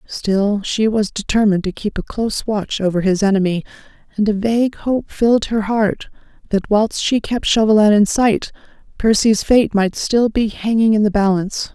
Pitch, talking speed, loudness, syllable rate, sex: 210 Hz, 180 wpm, -17 LUFS, 4.9 syllables/s, female